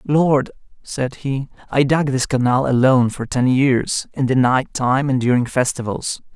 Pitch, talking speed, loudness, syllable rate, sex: 130 Hz, 170 wpm, -18 LUFS, 4.3 syllables/s, male